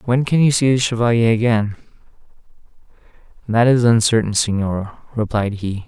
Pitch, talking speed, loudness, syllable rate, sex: 115 Hz, 135 wpm, -17 LUFS, 5.3 syllables/s, male